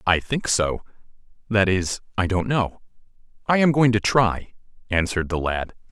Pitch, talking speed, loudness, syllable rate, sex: 100 Hz, 140 wpm, -22 LUFS, 4.7 syllables/s, male